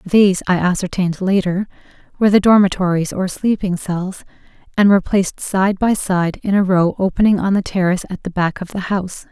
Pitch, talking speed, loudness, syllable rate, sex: 190 Hz, 185 wpm, -17 LUFS, 5.7 syllables/s, female